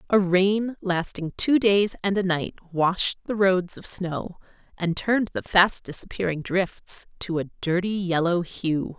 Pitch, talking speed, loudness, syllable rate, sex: 185 Hz, 160 wpm, -24 LUFS, 3.9 syllables/s, female